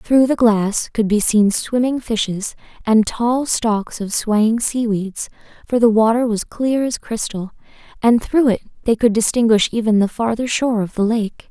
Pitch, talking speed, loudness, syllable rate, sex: 225 Hz, 175 wpm, -17 LUFS, 4.4 syllables/s, female